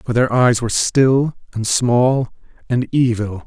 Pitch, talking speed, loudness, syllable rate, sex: 120 Hz, 155 wpm, -17 LUFS, 4.0 syllables/s, male